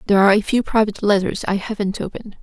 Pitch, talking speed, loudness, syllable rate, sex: 205 Hz, 220 wpm, -19 LUFS, 7.7 syllables/s, female